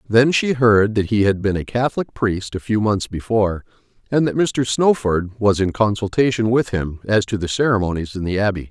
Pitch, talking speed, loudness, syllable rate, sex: 110 Hz, 205 wpm, -19 LUFS, 5.2 syllables/s, male